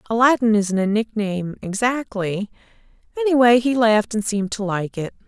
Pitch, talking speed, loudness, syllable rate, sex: 220 Hz, 150 wpm, -20 LUFS, 5.5 syllables/s, female